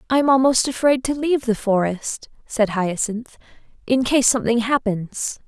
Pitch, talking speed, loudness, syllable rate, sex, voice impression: 240 Hz, 145 wpm, -20 LUFS, 4.6 syllables/s, female, feminine, adult-like, clear, slightly intellectual, slightly lively